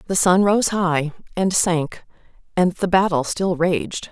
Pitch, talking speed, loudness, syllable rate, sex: 175 Hz, 160 wpm, -19 LUFS, 3.8 syllables/s, female